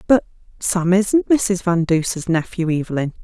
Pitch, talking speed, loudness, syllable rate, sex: 180 Hz, 150 wpm, -19 LUFS, 4.4 syllables/s, female